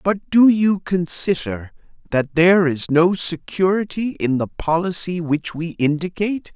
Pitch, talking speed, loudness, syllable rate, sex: 170 Hz, 135 wpm, -19 LUFS, 4.3 syllables/s, male